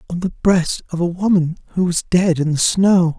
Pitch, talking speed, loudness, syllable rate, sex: 175 Hz, 225 wpm, -17 LUFS, 4.7 syllables/s, male